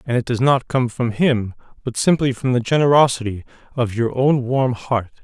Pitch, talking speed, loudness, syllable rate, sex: 125 Hz, 195 wpm, -18 LUFS, 5.0 syllables/s, male